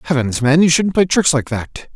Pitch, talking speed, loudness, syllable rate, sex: 150 Hz, 245 wpm, -15 LUFS, 5.0 syllables/s, male